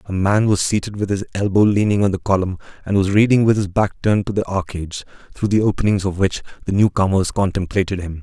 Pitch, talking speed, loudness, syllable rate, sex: 100 Hz, 225 wpm, -18 LUFS, 6.2 syllables/s, male